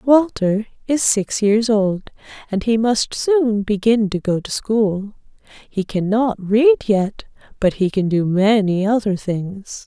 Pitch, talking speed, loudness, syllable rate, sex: 210 Hz, 150 wpm, -18 LUFS, 3.6 syllables/s, female